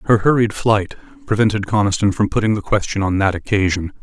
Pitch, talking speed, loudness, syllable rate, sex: 110 Hz, 180 wpm, -17 LUFS, 6.0 syllables/s, male